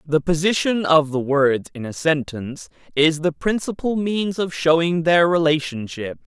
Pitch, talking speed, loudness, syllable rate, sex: 160 Hz, 150 wpm, -20 LUFS, 4.5 syllables/s, male